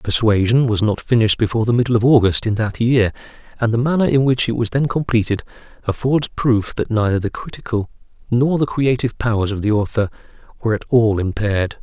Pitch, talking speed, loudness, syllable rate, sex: 115 Hz, 195 wpm, -18 LUFS, 6.0 syllables/s, male